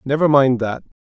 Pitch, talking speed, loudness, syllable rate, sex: 135 Hz, 170 wpm, -16 LUFS, 5.3 syllables/s, male